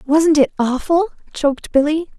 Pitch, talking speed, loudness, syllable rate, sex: 300 Hz, 135 wpm, -17 LUFS, 4.8 syllables/s, female